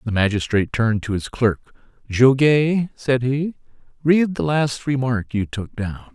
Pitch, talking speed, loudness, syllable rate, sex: 125 Hz, 155 wpm, -20 LUFS, 4.7 syllables/s, male